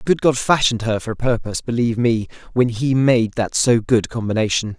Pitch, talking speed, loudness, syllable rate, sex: 120 Hz, 215 wpm, -18 LUFS, 5.9 syllables/s, male